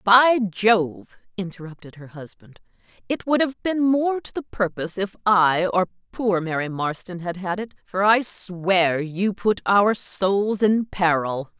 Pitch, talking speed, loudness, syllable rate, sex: 195 Hz, 160 wpm, -22 LUFS, 4.1 syllables/s, female